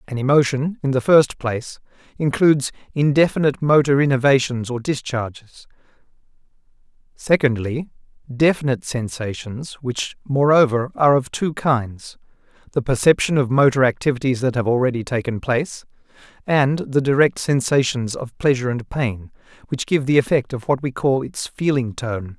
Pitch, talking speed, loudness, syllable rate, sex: 135 Hz, 135 wpm, -19 LUFS, 5.1 syllables/s, male